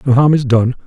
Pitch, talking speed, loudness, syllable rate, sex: 130 Hz, 280 wpm, -13 LUFS, 5.9 syllables/s, male